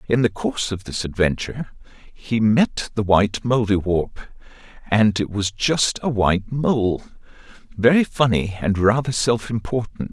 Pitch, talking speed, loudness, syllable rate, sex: 110 Hz, 140 wpm, -20 LUFS, 4.4 syllables/s, male